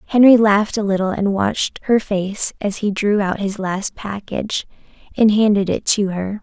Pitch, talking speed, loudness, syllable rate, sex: 205 Hz, 185 wpm, -18 LUFS, 4.8 syllables/s, female